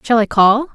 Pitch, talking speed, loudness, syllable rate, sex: 230 Hz, 240 wpm, -13 LUFS, 5.0 syllables/s, female